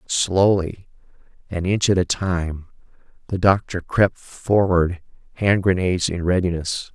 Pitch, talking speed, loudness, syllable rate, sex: 90 Hz, 120 wpm, -20 LUFS, 4.0 syllables/s, male